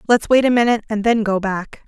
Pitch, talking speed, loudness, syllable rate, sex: 220 Hz, 290 wpm, -17 LUFS, 6.9 syllables/s, female